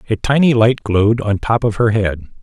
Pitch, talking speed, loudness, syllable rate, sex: 110 Hz, 220 wpm, -15 LUFS, 5.3 syllables/s, male